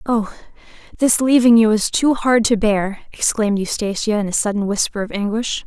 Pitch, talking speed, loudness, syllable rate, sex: 215 Hz, 180 wpm, -17 LUFS, 5.3 syllables/s, female